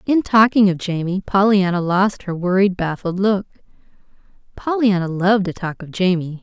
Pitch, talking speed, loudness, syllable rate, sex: 190 Hz, 150 wpm, -18 LUFS, 5.0 syllables/s, female